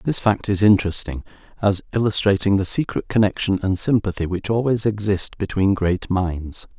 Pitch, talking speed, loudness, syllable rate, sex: 100 Hz, 150 wpm, -20 LUFS, 5.0 syllables/s, male